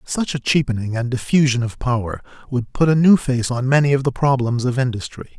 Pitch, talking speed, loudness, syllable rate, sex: 130 Hz, 210 wpm, -18 LUFS, 5.7 syllables/s, male